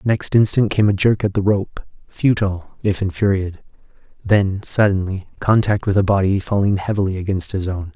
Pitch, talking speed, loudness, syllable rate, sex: 100 Hz, 165 wpm, -18 LUFS, 5.3 syllables/s, male